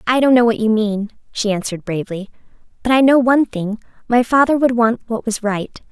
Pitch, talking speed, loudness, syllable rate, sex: 230 Hz, 215 wpm, -17 LUFS, 5.7 syllables/s, female